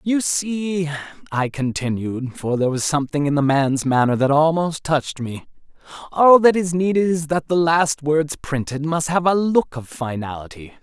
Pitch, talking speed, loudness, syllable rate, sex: 150 Hz, 175 wpm, -19 LUFS, 4.7 syllables/s, male